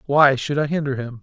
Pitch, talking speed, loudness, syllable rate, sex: 140 Hz, 245 wpm, -19 LUFS, 5.6 syllables/s, male